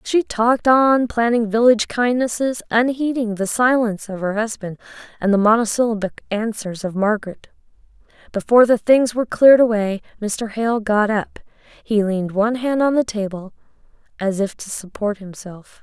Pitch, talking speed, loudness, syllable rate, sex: 220 Hz, 150 wpm, -18 LUFS, 5.1 syllables/s, female